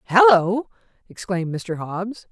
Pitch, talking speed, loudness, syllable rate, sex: 200 Hz, 105 wpm, -20 LUFS, 4.1 syllables/s, female